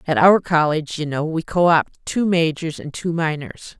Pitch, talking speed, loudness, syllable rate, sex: 160 Hz, 205 wpm, -19 LUFS, 4.8 syllables/s, female